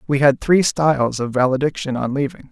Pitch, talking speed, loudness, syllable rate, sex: 140 Hz, 190 wpm, -18 LUFS, 5.5 syllables/s, male